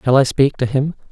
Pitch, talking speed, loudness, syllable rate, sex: 135 Hz, 270 wpm, -17 LUFS, 5.7 syllables/s, male